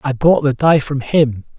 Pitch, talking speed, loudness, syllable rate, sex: 140 Hz, 225 wpm, -15 LUFS, 4.4 syllables/s, male